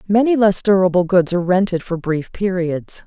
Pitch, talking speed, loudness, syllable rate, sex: 185 Hz, 175 wpm, -17 LUFS, 5.2 syllables/s, female